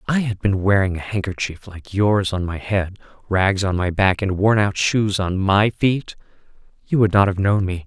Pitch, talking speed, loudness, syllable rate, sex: 100 Hz, 220 wpm, -19 LUFS, 4.8 syllables/s, male